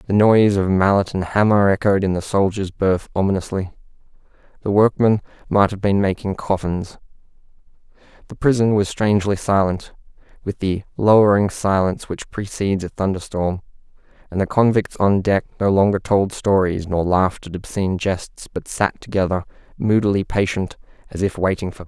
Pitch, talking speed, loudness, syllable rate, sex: 100 Hz, 155 wpm, -19 LUFS, 5.4 syllables/s, male